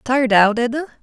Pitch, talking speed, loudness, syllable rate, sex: 245 Hz, 175 wpm, -16 LUFS, 6.3 syllables/s, female